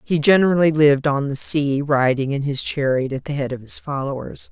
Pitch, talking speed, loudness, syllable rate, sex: 145 Hz, 210 wpm, -19 LUFS, 5.4 syllables/s, female